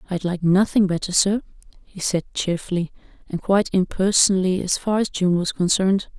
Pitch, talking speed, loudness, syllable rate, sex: 185 Hz, 165 wpm, -20 LUFS, 5.5 syllables/s, female